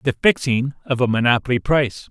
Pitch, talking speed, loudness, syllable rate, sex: 125 Hz, 170 wpm, -19 LUFS, 6.0 syllables/s, male